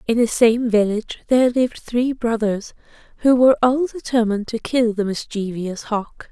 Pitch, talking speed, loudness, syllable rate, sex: 230 Hz, 160 wpm, -19 LUFS, 5.1 syllables/s, female